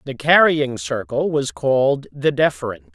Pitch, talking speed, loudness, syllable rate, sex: 135 Hz, 145 wpm, -18 LUFS, 4.5 syllables/s, male